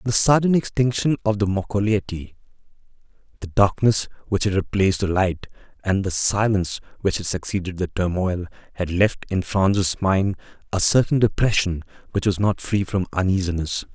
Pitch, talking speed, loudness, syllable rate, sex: 100 Hz, 150 wpm, -21 LUFS, 5.1 syllables/s, male